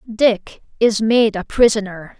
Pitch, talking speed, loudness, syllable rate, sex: 215 Hz, 135 wpm, -16 LUFS, 3.7 syllables/s, female